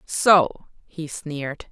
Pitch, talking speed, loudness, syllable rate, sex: 160 Hz, 105 wpm, -20 LUFS, 2.9 syllables/s, female